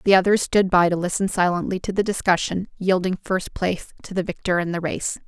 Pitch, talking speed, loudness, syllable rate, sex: 185 Hz, 215 wpm, -22 LUFS, 5.7 syllables/s, female